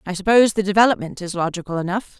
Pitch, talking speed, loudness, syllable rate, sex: 195 Hz, 190 wpm, -19 LUFS, 7.3 syllables/s, female